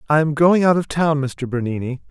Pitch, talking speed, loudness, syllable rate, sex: 150 Hz, 230 wpm, -18 LUFS, 5.4 syllables/s, male